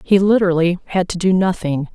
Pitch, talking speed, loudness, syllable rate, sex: 180 Hz, 185 wpm, -17 LUFS, 6.1 syllables/s, female